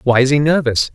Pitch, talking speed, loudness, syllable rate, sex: 140 Hz, 255 wpm, -14 LUFS, 5.9 syllables/s, male